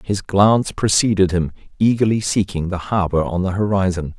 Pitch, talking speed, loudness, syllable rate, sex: 95 Hz, 160 wpm, -18 LUFS, 5.2 syllables/s, male